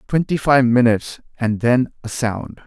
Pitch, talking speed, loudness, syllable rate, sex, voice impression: 120 Hz, 160 wpm, -18 LUFS, 4.4 syllables/s, male, masculine, adult-like, thick, tensed, powerful, clear, mature, friendly, slightly reassuring, wild, slightly lively